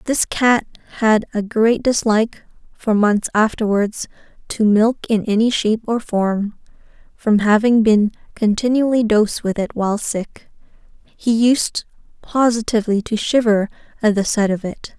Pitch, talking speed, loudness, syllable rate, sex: 220 Hz, 140 wpm, -17 LUFS, 4.5 syllables/s, female